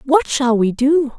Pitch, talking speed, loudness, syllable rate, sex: 265 Hz, 205 wpm, -16 LUFS, 3.9 syllables/s, female